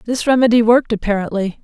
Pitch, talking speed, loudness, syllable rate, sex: 225 Hz, 145 wpm, -15 LUFS, 6.3 syllables/s, female